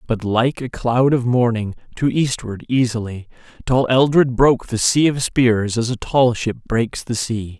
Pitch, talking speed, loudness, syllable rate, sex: 120 Hz, 180 wpm, -18 LUFS, 4.3 syllables/s, male